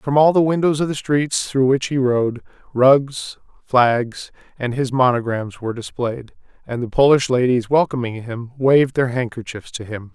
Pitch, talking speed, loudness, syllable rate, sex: 130 Hz, 170 wpm, -18 LUFS, 4.6 syllables/s, male